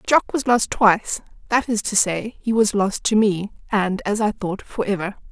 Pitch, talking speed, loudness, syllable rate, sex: 210 Hz, 215 wpm, -20 LUFS, 4.6 syllables/s, female